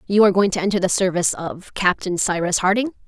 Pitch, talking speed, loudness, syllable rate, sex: 190 Hz, 215 wpm, -19 LUFS, 6.5 syllables/s, female